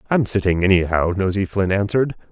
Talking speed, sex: 155 wpm, male